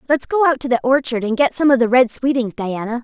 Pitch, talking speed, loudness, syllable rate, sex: 255 Hz, 275 wpm, -17 LUFS, 6.1 syllables/s, female